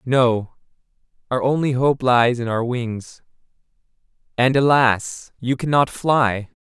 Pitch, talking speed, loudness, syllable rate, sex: 125 Hz, 110 wpm, -19 LUFS, 3.6 syllables/s, male